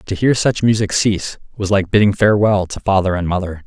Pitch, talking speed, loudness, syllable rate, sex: 100 Hz, 215 wpm, -16 LUFS, 5.9 syllables/s, male